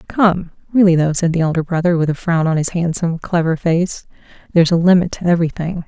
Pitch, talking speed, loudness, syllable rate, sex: 170 Hz, 205 wpm, -16 LUFS, 6.2 syllables/s, female